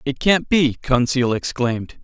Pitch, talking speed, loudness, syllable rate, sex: 135 Hz, 145 wpm, -19 LUFS, 4.3 syllables/s, male